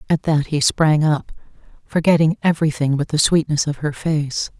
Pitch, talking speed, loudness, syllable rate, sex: 155 Hz, 170 wpm, -18 LUFS, 5.0 syllables/s, female